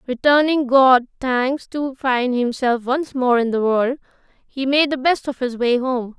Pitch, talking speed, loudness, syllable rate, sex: 260 Hz, 185 wpm, -18 LUFS, 4.1 syllables/s, female